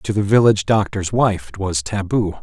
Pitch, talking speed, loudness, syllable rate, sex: 100 Hz, 200 wpm, -18 LUFS, 5.1 syllables/s, male